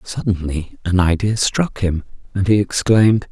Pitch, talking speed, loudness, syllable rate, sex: 100 Hz, 145 wpm, -18 LUFS, 4.6 syllables/s, male